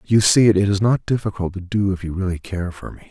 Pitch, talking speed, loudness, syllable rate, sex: 95 Hz, 270 wpm, -19 LUFS, 5.7 syllables/s, male